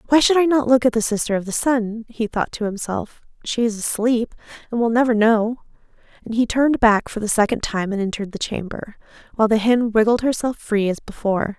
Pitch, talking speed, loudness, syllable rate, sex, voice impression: 225 Hz, 220 wpm, -20 LUFS, 5.8 syllables/s, female, very feminine, slightly adult-like, thin, slightly tensed, slightly weak, bright, soft, slightly muffled, slightly halting, slightly raspy, cute, very intellectual, refreshing, sincere, slightly calm, friendly, very reassuring, very unique, slightly elegant, sweet, lively, slightly strict, slightly intense